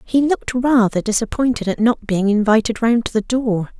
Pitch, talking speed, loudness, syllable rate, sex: 230 Hz, 190 wpm, -17 LUFS, 5.2 syllables/s, female